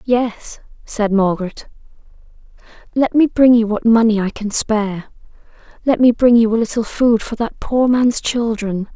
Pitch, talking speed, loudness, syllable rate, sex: 225 Hz, 155 wpm, -16 LUFS, 4.6 syllables/s, female